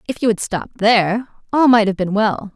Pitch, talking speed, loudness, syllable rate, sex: 215 Hz, 235 wpm, -17 LUFS, 5.7 syllables/s, female